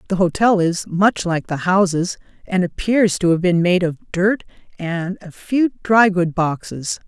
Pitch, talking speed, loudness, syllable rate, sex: 185 Hz, 170 wpm, -18 LUFS, 4.1 syllables/s, female